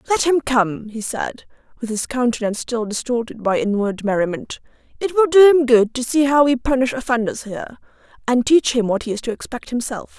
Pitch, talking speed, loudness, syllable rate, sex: 245 Hz, 200 wpm, -19 LUFS, 5.5 syllables/s, female